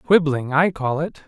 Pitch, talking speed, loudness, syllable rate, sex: 155 Hz, 190 wpm, -20 LUFS, 4.4 syllables/s, male